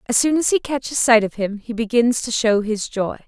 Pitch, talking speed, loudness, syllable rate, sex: 230 Hz, 255 wpm, -19 LUFS, 5.1 syllables/s, female